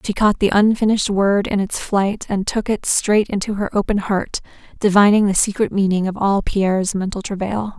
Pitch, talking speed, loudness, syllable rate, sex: 200 Hz, 195 wpm, -18 LUFS, 5.1 syllables/s, female